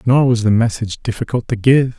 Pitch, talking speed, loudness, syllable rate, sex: 115 Hz, 210 wpm, -16 LUFS, 5.8 syllables/s, male